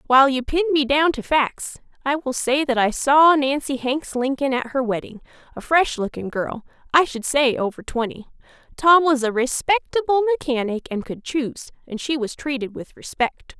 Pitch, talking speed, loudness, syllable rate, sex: 270 Hz, 185 wpm, -20 LUFS, 4.8 syllables/s, female